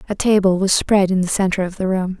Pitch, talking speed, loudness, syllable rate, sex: 190 Hz, 275 wpm, -17 LUFS, 6.0 syllables/s, female